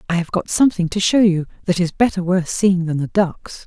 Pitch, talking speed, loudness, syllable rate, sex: 180 Hz, 245 wpm, -18 LUFS, 5.5 syllables/s, female